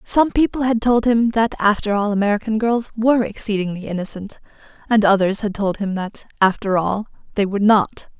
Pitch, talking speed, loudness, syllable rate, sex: 210 Hz, 175 wpm, -19 LUFS, 5.4 syllables/s, female